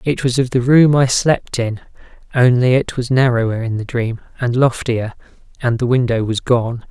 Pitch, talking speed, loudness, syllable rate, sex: 125 Hz, 190 wpm, -16 LUFS, 4.8 syllables/s, male